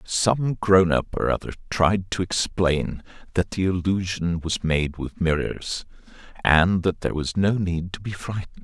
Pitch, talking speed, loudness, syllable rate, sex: 90 Hz, 165 wpm, -23 LUFS, 4.4 syllables/s, male